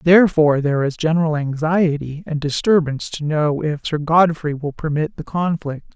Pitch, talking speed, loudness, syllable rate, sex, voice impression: 155 Hz, 160 wpm, -19 LUFS, 5.2 syllables/s, female, very feminine, middle-aged, thin, slightly tensed, powerful, bright, soft, slightly muffled, fluent, slightly cute, cool, intellectual, refreshing, sincere, very calm, friendly, reassuring, very unique, elegant, wild, slightly sweet, lively, kind, slightly intense, slightly sharp